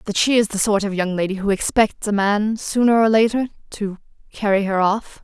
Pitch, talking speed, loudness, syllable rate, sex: 205 Hz, 220 wpm, -19 LUFS, 5.3 syllables/s, female